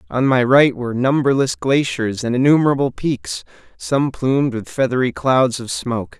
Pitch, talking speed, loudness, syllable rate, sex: 130 Hz, 155 wpm, -17 LUFS, 5.0 syllables/s, male